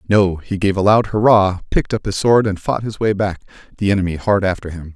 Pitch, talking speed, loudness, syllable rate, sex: 100 Hz, 240 wpm, -17 LUFS, 5.8 syllables/s, male